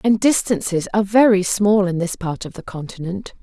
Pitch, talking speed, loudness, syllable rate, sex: 195 Hz, 195 wpm, -18 LUFS, 5.3 syllables/s, female